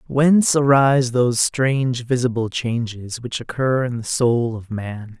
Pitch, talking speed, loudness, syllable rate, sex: 125 Hz, 150 wpm, -19 LUFS, 4.4 syllables/s, male